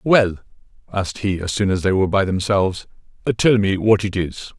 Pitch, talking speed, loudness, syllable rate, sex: 100 Hz, 195 wpm, -19 LUFS, 5.4 syllables/s, male